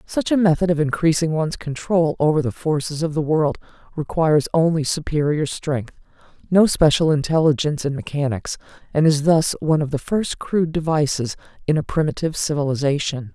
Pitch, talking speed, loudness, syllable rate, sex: 155 Hz, 155 wpm, -20 LUFS, 5.7 syllables/s, female